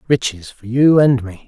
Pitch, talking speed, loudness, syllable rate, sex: 120 Hz, 205 wpm, -15 LUFS, 4.7 syllables/s, male